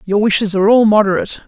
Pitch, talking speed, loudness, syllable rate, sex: 205 Hz, 205 wpm, -13 LUFS, 7.5 syllables/s, female